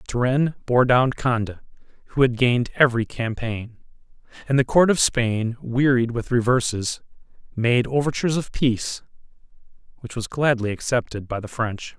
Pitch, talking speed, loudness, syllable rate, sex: 120 Hz, 140 wpm, -22 LUFS, 5.0 syllables/s, male